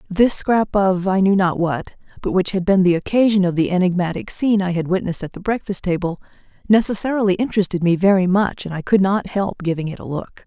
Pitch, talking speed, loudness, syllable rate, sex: 190 Hz, 220 wpm, -18 LUFS, 6.1 syllables/s, female